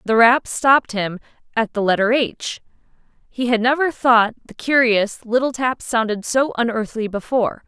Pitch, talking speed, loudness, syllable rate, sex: 235 Hz, 155 wpm, -18 LUFS, 4.7 syllables/s, female